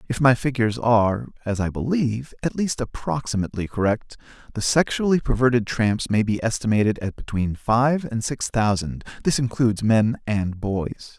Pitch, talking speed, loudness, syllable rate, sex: 115 Hz, 155 wpm, -22 LUFS, 5.1 syllables/s, male